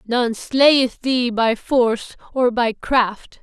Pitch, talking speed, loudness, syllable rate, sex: 240 Hz, 140 wpm, -18 LUFS, 3.0 syllables/s, female